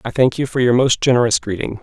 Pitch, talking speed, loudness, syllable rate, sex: 120 Hz, 260 wpm, -16 LUFS, 6.4 syllables/s, male